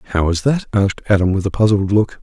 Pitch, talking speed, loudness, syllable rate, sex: 100 Hz, 245 wpm, -16 LUFS, 6.6 syllables/s, male